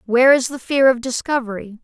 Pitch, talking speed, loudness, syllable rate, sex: 250 Hz, 195 wpm, -17 LUFS, 6.0 syllables/s, female